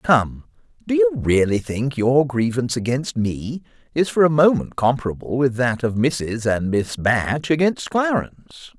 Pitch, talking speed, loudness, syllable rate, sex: 135 Hz, 155 wpm, -20 LUFS, 4.4 syllables/s, male